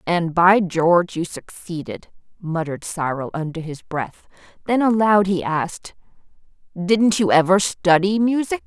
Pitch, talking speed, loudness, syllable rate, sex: 180 Hz, 130 wpm, -19 LUFS, 4.4 syllables/s, female